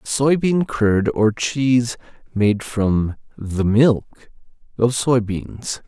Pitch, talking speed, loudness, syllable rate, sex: 115 Hz, 100 wpm, -19 LUFS, 2.7 syllables/s, male